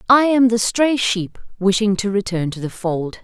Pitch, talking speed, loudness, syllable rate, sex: 210 Hz, 205 wpm, -18 LUFS, 4.6 syllables/s, female